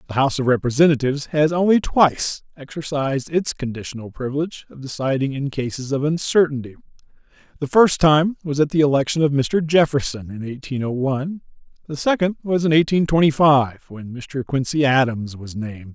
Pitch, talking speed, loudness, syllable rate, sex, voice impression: 140 Hz, 165 wpm, -19 LUFS, 5.6 syllables/s, male, very masculine, middle-aged, thick, slightly muffled, sincere, friendly